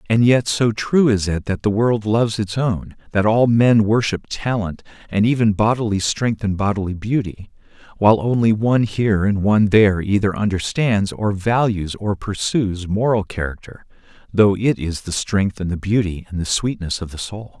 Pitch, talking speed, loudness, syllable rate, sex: 105 Hz, 180 wpm, -19 LUFS, 4.9 syllables/s, male